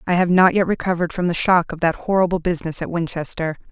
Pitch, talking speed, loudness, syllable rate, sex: 175 Hz, 225 wpm, -19 LUFS, 6.7 syllables/s, female